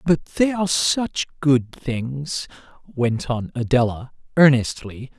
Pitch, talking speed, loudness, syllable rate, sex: 135 Hz, 115 wpm, -21 LUFS, 3.6 syllables/s, male